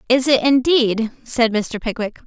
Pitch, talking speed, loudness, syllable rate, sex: 240 Hz, 160 wpm, -18 LUFS, 4.3 syllables/s, female